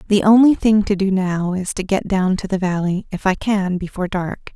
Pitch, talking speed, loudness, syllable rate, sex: 190 Hz, 235 wpm, -18 LUFS, 5.1 syllables/s, female